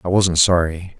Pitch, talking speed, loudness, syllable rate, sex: 85 Hz, 180 wpm, -16 LUFS, 4.5 syllables/s, male